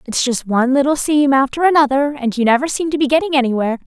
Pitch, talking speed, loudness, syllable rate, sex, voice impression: 270 Hz, 225 wpm, -15 LUFS, 6.8 syllables/s, female, very feminine, slightly young, very thin, tensed, powerful, very bright, hard, very clear, fluent, raspy, cute, slightly intellectual, very refreshing, slightly sincere, calm, friendly, slightly reassuring, very unique, slightly elegant, very wild, very lively, strict, intense, sharp, light